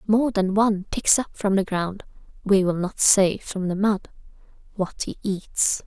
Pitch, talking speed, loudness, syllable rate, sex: 195 Hz, 165 wpm, -22 LUFS, 4.2 syllables/s, female